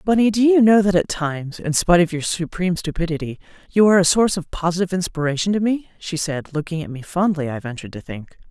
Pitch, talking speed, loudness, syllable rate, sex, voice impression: 175 Hz, 225 wpm, -19 LUFS, 6.7 syllables/s, female, feminine, adult-like, tensed, clear, fluent, intellectual, slightly calm, friendly, elegant, lively, slightly strict, slightly sharp